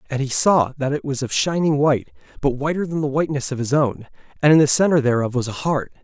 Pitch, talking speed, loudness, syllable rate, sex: 140 Hz, 250 wpm, -19 LUFS, 6.3 syllables/s, male